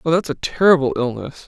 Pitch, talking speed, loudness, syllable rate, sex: 145 Hz, 205 wpm, -18 LUFS, 6.0 syllables/s, male